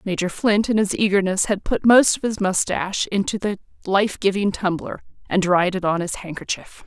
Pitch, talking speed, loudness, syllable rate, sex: 195 Hz, 190 wpm, -20 LUFS, 5.1 syllables/s, female